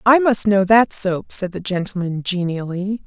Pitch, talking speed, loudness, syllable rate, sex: 195 Hz, 175 wpm, -18 LUFS, 4.4 syllables/s, female